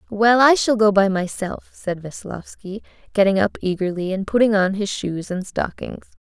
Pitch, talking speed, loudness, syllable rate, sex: 200 Hz, 175 wpm, -19 LUFS, 4.7 syllables/s, female